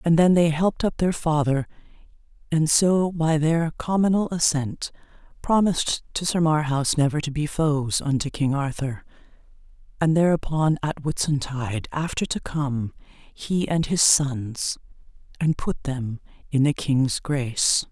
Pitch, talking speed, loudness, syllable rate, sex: 150 Hz, 140 wpm, -23 LUFS, 4.2 syllables/s, female